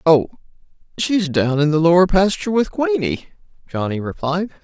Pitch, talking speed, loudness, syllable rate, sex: 175 Hz, 145 wpm, -18 LUFS, 5.1 syllables/s, female